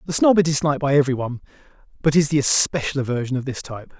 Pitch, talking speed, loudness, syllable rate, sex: 140 Hz, 225 wpm, -20 LUFS, 7.8 syllables/s, male